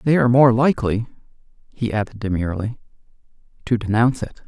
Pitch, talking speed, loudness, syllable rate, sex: 115 Hz, 135 wpm, -19 LUFS, 6.5 syllables/s, male